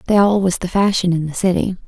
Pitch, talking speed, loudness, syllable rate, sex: 185 Hz, 255 wpm, -17 LUFS, 6.2 syllables/s, female